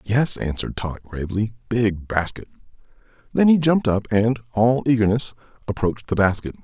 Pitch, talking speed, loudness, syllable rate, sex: 110 Hz, 145 wpm, -21 LUFS, 5.5 syllables/s, male